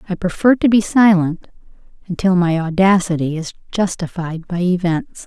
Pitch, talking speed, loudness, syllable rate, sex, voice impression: 185 Hz, 135 wpm, -17 LUFS, 4.8 syllables/s, female, feminine, adult-like, sincere, slightly calm, slightly unique